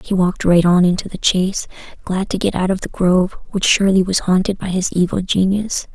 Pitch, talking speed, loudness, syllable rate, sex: 185 Hz, 220 wpm, -17 LUFS, 5.8 syllables/s, female